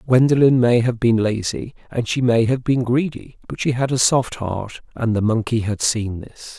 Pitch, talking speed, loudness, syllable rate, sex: 120 Hz, 210 wpm, -19 LUFS, 4.6 syllables/s, male